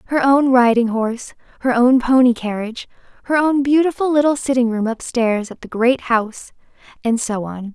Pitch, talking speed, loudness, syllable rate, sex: 245 Hz, 170 wpm, -17 LUFS, 5.2 syllables/s, female